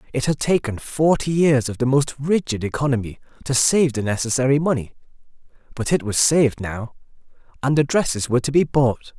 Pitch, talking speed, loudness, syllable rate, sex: 135 Hz, 175 wpm, -20 LUFS, 5.6 syllables/s, male